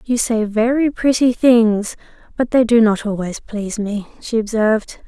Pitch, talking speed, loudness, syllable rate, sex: 225 Hz, 165 wpm, -17 LUFS, 4.5 syllables/s, female